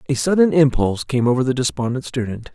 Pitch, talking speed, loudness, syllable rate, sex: 130 Hz, 190 wpm, -18 LUFS, 6.4 syllables/s, male